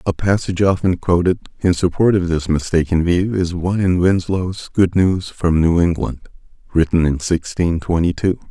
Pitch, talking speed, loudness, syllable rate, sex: 90 Hz, 170 wpm, -17 LUFS, 4.9 syllables/s, male